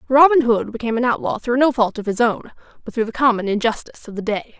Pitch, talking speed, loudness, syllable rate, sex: 235 Hz, 250 wpm, -18 LUFS, 6.6 syllables/s, female